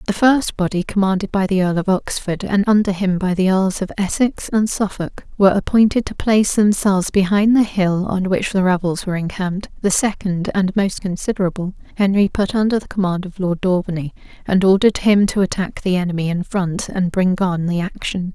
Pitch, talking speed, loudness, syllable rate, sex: 190 Hz, 195 wpm, -18 LUFS, 5.5 syllables/s, female